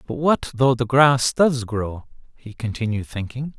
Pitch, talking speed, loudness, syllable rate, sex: 125 Hz, 165 wpm, -20 LUFS, 4.2 syllables/s, male